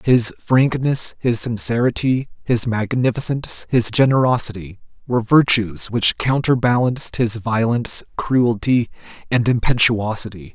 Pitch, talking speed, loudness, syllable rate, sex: 120 Hz, 95 wpm, -18 LUFS, 4.5 syllables/s, male